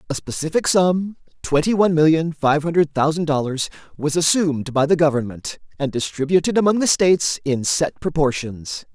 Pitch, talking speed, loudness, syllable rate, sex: 155 Hz, 155 wpm, -19 LUFS, 5.3 syllables/s, male